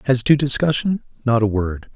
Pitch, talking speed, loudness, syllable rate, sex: 125 Hz, 155 wpm, -19 LUFS, 4.9 syllables/s, male